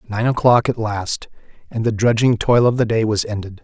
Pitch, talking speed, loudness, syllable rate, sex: 110 Hz, 215 wpm, -18 LUFS, 5.2 syllables/s, male